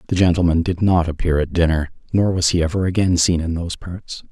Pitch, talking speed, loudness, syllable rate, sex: 85 Hz, 220 wpm, -18 LUFS, 5.9 syllables/s, male